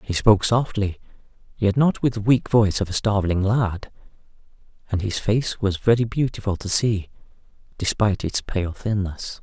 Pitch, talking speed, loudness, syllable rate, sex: 105 Hz, 160 wpm, -22 LUFS, 4.9 syllables/s, male